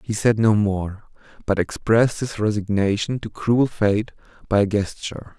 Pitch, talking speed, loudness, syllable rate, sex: 105 Hz, 155 wpm, -21 LUFS, 4.6 syllables/s, male